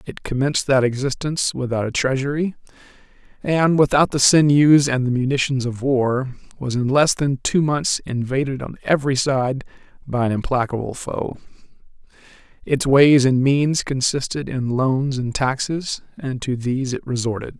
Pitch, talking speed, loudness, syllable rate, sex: 135 Hz, 150 wpm, -19 LUFS, 4.8 syllables/s, male